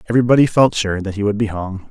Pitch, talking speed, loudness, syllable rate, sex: 105 Hz, 250 wpm, -16 LUFS, 7.0 syllables/s, male